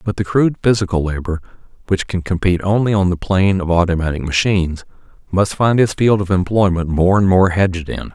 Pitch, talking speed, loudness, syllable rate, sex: 95 Hz, 190 wpm, -16 LUFS, 5.9 syllables/s, male